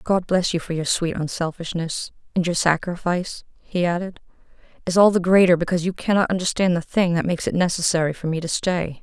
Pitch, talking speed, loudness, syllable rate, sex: 175 Hz, 200 wpm, -21 LUFS, 6.0 syllables/s, female